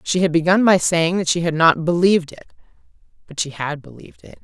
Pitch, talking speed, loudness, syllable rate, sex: 170 Hz, 205 wpm, -17 LUFS, 6.1 syllables/s, female